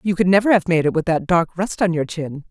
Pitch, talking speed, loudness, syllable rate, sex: 175 Hz, 310 wpm, -18 LUFS, 5.9 syllables/s, female